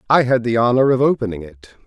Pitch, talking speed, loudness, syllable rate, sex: 115 Hz, 225 wpm, -16 LUFS, 6.3 syllables/s, male